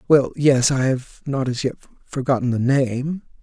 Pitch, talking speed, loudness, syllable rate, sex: 135 Hz, 175 wpm, -20 LUFS, 4.4 syllables/s, male